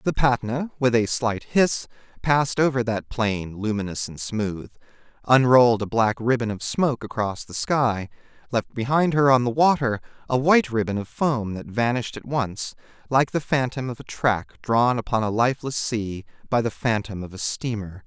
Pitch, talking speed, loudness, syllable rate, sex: 120 Hz, 180 wpm, -23 LUFS, 4.9 syllables/s, male